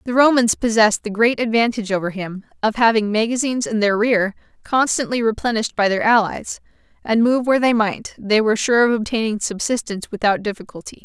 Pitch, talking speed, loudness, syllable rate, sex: 220 Hz, 175 wpm, -18 LUFS, 6.0 syllables/s, female